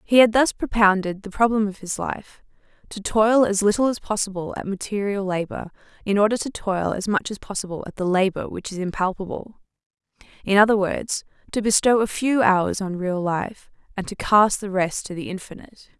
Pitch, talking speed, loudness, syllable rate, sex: 200 Hz, 190 wpm, -22 LUFS, 5.3 syllables/s, female